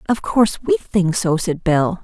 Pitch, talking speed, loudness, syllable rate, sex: 190 Hz, 205 wpm, -18 LUFS, 4.5 syllables/s, female